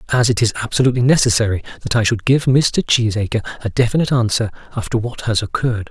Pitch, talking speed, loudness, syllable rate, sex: 115 Hz, 185 wpm, -17 LUFS, 6.8 syllables/s, male